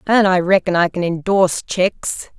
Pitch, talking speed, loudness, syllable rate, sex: 185 Hz, 175 wpm, -17 LUFS, 5.1 syllables/s, female